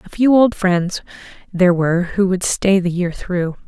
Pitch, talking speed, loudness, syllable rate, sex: 185 Hz, 195 wpm, -17 LUFS, 4.7 syllables/s, female